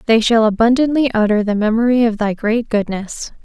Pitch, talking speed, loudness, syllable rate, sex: 225 Hz, 175 wpm, -15 LUFS, 5.4 syllables/s, female